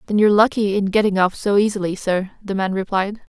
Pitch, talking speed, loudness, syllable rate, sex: 200 Hz, 215 wpm, -19 LUFS, 5.9 syllables/s, female